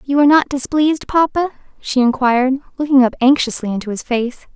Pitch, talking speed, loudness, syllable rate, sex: 265 Hz, 170 wpm, -16 LUFS, 6.0 syllables/s, female